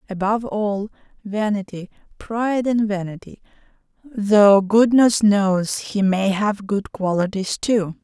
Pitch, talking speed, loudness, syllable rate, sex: 205 Hz, 110 wpm, -19 LUFS, 3.8 syllables/s, female